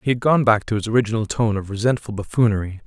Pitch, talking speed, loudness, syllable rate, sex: 110 Hz, 230 wpm, -20 LUFS, 6.9 syllables/s, male